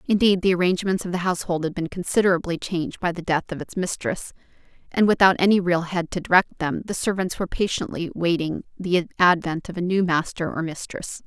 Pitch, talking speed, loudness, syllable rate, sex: 180 Hz, 195 wpm, -23 LUFS, 5.9 syllables/s, female